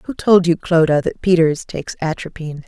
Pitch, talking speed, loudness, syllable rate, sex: 170 Hz, 180 wpm, -17 LUFS, 5.5 syllables/s, female